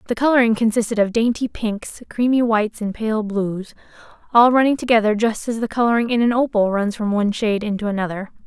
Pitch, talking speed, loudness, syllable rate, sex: 220 Hz, 190 wpm, -19 LUFS, 6.0 syllables/s, female